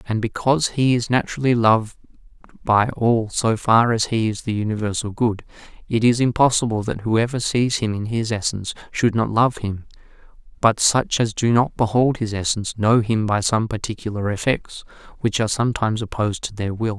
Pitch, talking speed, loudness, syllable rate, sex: 110 Hz, 180 wpm, -20 LUFS, 5.5 syllables/s, male